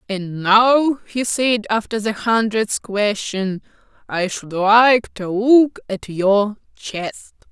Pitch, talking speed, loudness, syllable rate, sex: 215 Hz, 130 wpm, -18 LUFS, 3.0 syllables/s, female